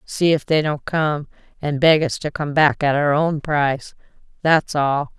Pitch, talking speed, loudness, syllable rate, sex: 150 Hz, 195 wpm, -19 LUFS, 4.2 syllables/s, female